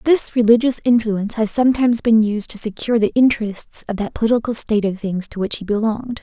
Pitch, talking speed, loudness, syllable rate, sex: 220 Hz, 200 wpm, -18 LUFS, 6.3 syllables/s, female